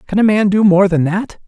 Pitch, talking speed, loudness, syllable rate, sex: 195 Hz, 285 wpm, -13 LUFS, 5.4 syllables/s, female